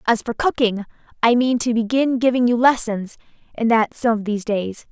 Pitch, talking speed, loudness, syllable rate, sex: 230 Hz, 195 wpm, -19 LUFS, 5.2 syllables/s, female